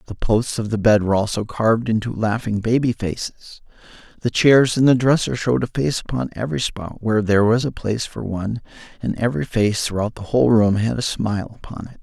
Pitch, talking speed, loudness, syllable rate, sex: 110 Hz, 210 wpm, -20 LUFS, 6.1 syllables/s, male